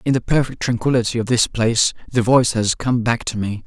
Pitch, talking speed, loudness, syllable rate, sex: 120 Hz, 230 wpm, -18 LUFS, 6.0 syllables/s, male